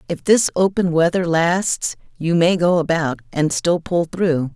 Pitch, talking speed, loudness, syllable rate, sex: 170 Hz, 170 wpm, -18 LUFS, 4.0 syllables/s, female